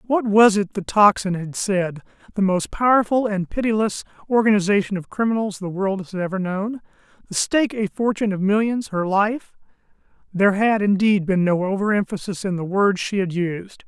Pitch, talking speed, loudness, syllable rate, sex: 200 Hz, 160 wpm, -20 LUFS, 5.2 syllables/s, male